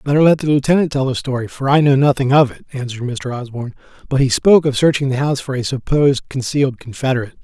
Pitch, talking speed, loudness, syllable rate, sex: 135 Hz, 225 wpm, -16 LUFS, 7.0 syllables/s, male